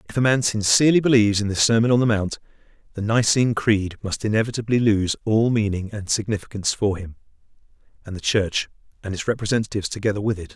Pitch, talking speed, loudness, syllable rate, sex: 105 Hz, 180 wpm, -21 LUFS, 6.6 syllables/s, male